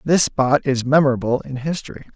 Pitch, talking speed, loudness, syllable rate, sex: 135 Hz, 165 wpm, -19 LUFS, 5.6 syllables/s, male